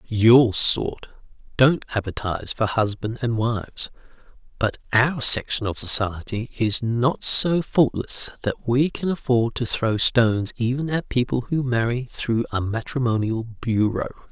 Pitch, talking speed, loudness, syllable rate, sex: 120 Hz, 140 wpm, -21 LUFS, 4.1 syllables/s, male